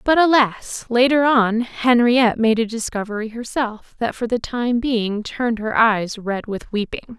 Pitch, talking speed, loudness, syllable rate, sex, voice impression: 230 Hz, 165 wpm, -19 LUFS, 4.3 syllables/s, female, very feminine, young, thin, tensed, slightly powerful, bright, soft, very clear, slightly fluent, slightly raspy, very cute, intellectual, very refreshing, sincere, calm, very friendly, very reassuring, very unique, elegant, slightly wild, very sweet, lively, kind, slightly sharp, slightly modest